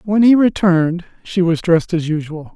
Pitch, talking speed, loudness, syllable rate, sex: 175 Hz, 190 wpm, -15 LUFS, 5.3 syllables/s, male